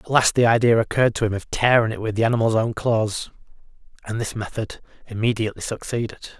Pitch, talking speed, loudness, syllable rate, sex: 110 Hz, 190 wpm, -21 LUFS, 6.5 syllables/s, male